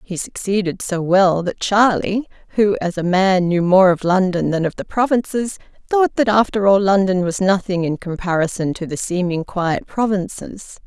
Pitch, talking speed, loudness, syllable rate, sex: 190 Hz, 175 wpm, -18 LUFS, 4.7 syllables/s, female